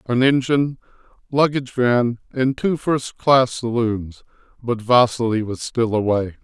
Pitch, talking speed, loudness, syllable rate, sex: 120 Hz, 120 wpm, -19 LUFS, 4.3 syllables/s, male